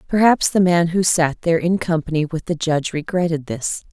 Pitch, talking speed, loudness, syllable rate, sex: 170 Hz, 200 wpm, -18 LUFS, 5.4 syllables/s, female